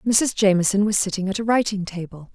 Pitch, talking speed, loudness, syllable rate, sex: 200 Hz, 205 wpm, -20 LUFS, 5.9 syllables/s, female